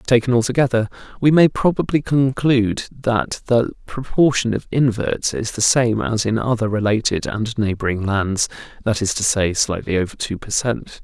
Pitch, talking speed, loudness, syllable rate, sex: 115 Hz, 165 wpm, -19 LUFS, 4.8 syllables/s, male